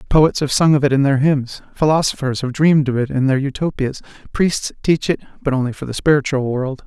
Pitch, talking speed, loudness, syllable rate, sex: 140 Hz, 220 wpm, -17 LUFS, 5.7 syllables/s, male